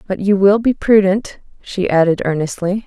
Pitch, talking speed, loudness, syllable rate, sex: 195 Hz, 165 wpm, -15 LUFS, 4.8 syllables/s, female